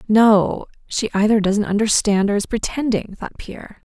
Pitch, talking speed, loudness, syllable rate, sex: 210 Hz, 155 wpm, -18 LUFS, 4.8 syllables/s, female